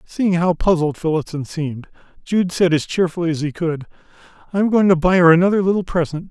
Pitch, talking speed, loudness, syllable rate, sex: 170 Hz, 200 wpm, -18 LUFS, 6.0 syllables/s, male